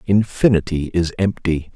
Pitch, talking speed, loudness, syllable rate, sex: 90 Hz, 105 wpm, -19 LUFS, 4.6 syllables/s, male